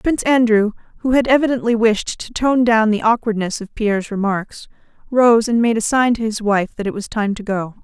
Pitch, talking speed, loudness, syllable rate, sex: 225 Hz, 215 wpm, -17 LUFS, 5.3 syllables/s, female